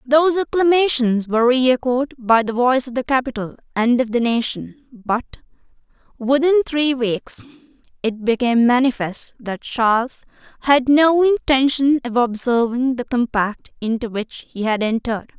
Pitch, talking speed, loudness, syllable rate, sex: 250 Hz, 135 wpm, -18 LUFS, 4.8 syllables/s, female